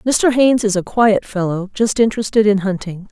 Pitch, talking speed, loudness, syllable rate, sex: 210 Hz, 190 wpm, -16 LUFS, 5.3 syllables/s, female